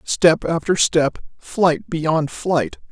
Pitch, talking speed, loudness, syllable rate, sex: 165 Hz, 125 wpm, -19 LUFS, 2.7 syllables/s, female